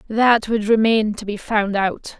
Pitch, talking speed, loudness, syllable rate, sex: 215 Hz, 190 wpm, -18 LUFS, 4.0 syllables/s, female